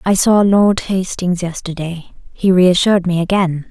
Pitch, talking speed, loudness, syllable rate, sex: 180 Hz, 145 wpm, -15 LUFS, 4.4 syllables/s, female